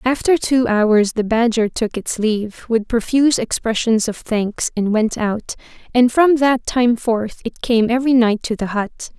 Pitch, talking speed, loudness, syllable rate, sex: 230 Hz, 185 wpm, -17 LUFS, 4.3 syllables/s, female